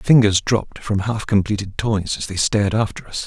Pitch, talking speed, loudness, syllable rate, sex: 105 Hz, 200 wpm, -20 LUFS, 5.3 syllables/s, male